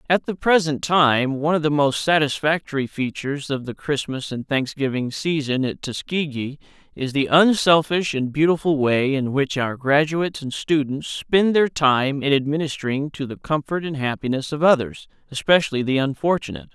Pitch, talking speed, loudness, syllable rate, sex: 145 Hz, 160 wpm, -21 LUFS, 5.1 syllables/s, male